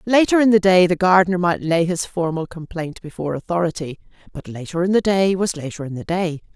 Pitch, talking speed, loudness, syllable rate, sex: 175 Hz, 210 wpm, -19 LUFS, 5.9 syllables/s, female